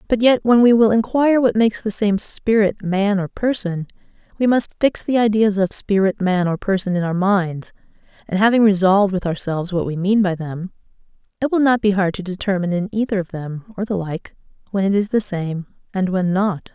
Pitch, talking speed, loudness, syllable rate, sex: 200 Hz, 210 wpm, -18 LUFS, 5.4 syllables/s, female